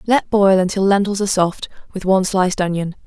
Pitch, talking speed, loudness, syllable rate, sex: 190 Hz, 195 wpm, -17 LUFS, 6.1 syllables/s, female